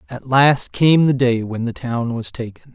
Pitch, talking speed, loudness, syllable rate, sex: 125 Hz, 220 wpm, -17 LUFS, 4.3 syllables/s, male